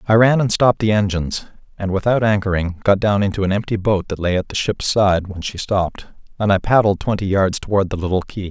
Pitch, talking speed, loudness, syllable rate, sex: 100 Hz, 235 wpm, -18 LUFS, 6.0 syllables/s, male